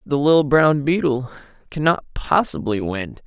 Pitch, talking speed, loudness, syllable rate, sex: 145 Hz, 145 wpm, -19 LUFS, 4.7 syllables/s, male